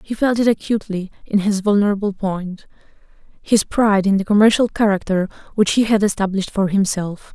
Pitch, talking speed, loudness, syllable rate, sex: 205 Hz, 155 wpm, -18 LUFS, 5.7 syllables/s, female